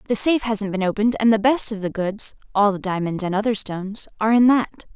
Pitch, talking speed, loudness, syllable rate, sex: 210 Hz, 220 wpm, -20 LUFS, 6.1 syllables/s, female